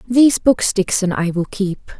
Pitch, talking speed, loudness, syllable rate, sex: 205 Hz, 180 wpm, -17 LUFS, 4.4 syllables/s, female